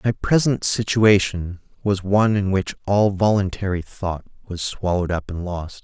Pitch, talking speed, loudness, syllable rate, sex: 95 Hz, 155 wpm, -21 LUFS, 4.6 syllables/s, male